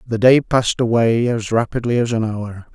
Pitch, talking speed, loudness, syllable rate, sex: 115 Hz, 195 wpm, -17 LUFS, 5.0 syllables/s, male